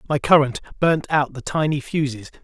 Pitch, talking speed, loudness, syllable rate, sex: 145 Hz, 170 wpm, -20 LUFS, 5.7 syllables/s, male